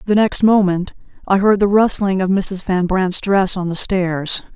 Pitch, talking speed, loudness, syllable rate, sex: 190 Hz, 200 wpm, -16 LUFS, 4.3 syllables/s, female